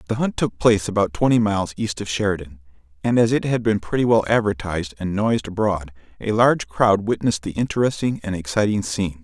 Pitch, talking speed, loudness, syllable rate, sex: 105 Hz, 195 wpm, -21 LUFS, 6.2 syllables/s, male